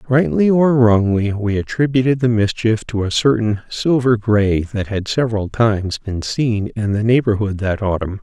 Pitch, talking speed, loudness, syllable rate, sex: 110 Hz, 170 wpm, -17 LUFS, 4.6 syllables/s, male